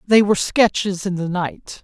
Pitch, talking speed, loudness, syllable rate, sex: 190 Hz, 195 wpm, -19 LUFS, 4.6 syllables/s, male